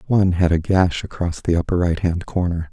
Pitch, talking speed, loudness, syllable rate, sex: 90 Hz, 220 wpm, -20 LUFS, 5.5 syllables/s, male